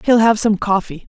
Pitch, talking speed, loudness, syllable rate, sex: 210 Hz, 205 wpm, -16 LUFS, 5.1 syllables/s, female